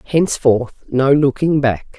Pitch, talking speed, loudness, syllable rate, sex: 135 Hz, 120 wpm, -16 LUFS, 3.9 syllables/s, female